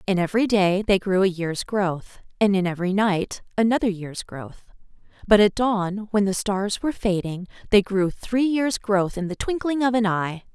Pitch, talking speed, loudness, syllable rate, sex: 200 Hz, 195 wpm, -22 LUFS, 4.7 syllables/s, female